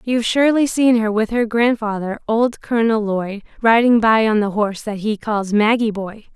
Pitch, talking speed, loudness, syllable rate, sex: 220 Hz, 190 wpm, -17 LUFS, 5.1 syllables/s, female